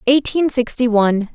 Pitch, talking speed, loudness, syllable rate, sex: 245 Hz, 135 wpm, -16 LUFS, 5.1 syllables/s, female